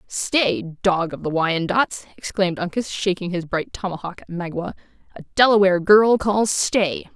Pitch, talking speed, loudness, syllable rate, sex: 190 Hz, 150 wpm, -20 LUFS, 4.7 syllables/s, female